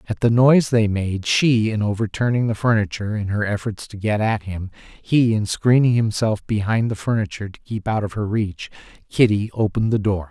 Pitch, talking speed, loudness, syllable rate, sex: 105 Hz, 200 wpm, -20 LUFS, 5.4 syllables/s, male